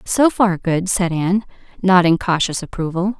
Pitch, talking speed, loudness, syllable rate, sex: 180 Hz, 150 wpm, -17 LUFS, 4.7 syllables/s, female